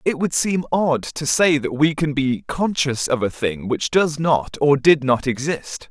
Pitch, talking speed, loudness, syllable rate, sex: 145 Hz, 215 wpm, -19 LUFS, 4.0 syllables/s, male